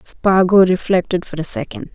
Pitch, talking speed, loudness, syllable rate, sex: 185 Hz, 155 wpm, -16 LUFS, 4.9 syllables/s, female